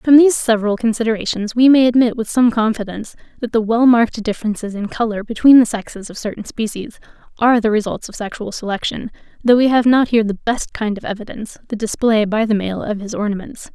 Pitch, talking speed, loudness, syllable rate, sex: 225 Hz, 205 wpm, -17 LUFS, 6.2 syllables/s, female